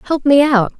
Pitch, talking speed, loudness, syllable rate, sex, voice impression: 270 Hz, 225 wpm, -13 LUFS, 4.8 syllables/s, female, feminine, slightly middle-aged, calm, elegant